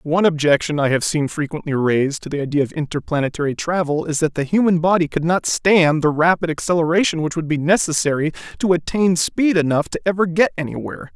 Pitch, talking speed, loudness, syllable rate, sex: 160 Hz, 195 wpm, -18 LUFS, 6.1 syllables/s, male